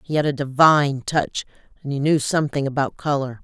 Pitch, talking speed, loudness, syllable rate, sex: 140 Hz, 190 wpm, -20 LUFS, 5.7 syllables/s, female